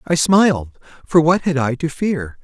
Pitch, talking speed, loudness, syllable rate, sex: 150 Hz, 175 wpm, -17 LUFS, 4.6 syllables/s, male